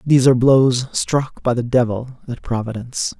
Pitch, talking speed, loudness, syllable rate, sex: 125 Hz, 170 wpm, -18 LUFS, 5.1 syllables/s, male